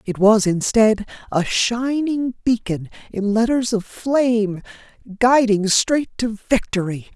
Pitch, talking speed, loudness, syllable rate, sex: 220 Hz, 115 wpm, -19 LUFS, 3.8 syllables/s, female